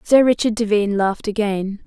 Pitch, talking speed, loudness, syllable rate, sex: 210 Hz, 160 wpm, -18 LUFS, 5.8 syllables/s, female